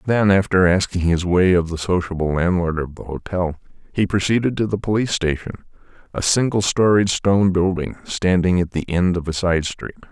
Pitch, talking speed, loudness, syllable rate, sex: 90 Hz, 185 wpm, -19 LUFS, 5.4 syllables/s, male